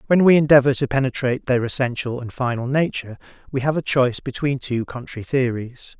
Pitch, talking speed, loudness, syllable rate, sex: 130 Hz, 180 wpm, -20 LUFS, 6.0 syllables/s, male